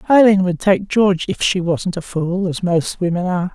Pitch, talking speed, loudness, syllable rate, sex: 185 Hz, 220 wpm, -17 LUFS, 5.1 syllables/s, female